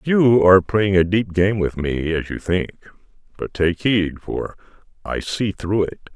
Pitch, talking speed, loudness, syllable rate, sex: 95 Hz, 185 wpm, -19 LUFS, 4.0 syllables/s, male